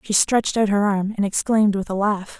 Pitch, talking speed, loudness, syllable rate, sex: 205 Hz, 250 wpm, -20 LUFS, 5.7 syllables/s, female